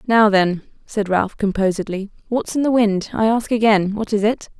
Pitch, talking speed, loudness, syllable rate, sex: 210 Hz, 195 wpm, -18 LUFS, 4.8 syllables/s, female